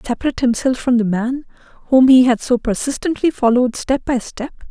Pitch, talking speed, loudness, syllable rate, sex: 250 Hz, 180 wpm, -16 LUFS, 5.8 syllables/s, female